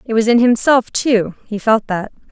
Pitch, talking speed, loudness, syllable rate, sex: 225 Hz, 210 wpm, -15 LUFS, 4.6 syllables/s, female